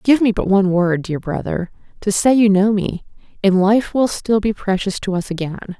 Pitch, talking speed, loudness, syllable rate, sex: 200 Hz, 215 wpm, -17 LUFS, 5.0 syllables/s, female